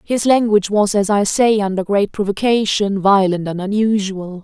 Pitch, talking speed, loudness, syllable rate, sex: 205 Hz, 160 wpm, -16 LUFS, 4.9 syllables/s, female